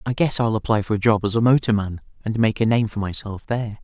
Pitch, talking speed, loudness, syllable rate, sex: 110 Hz, 265 wpm, -21 LUFS, 6.4 syllables/s, male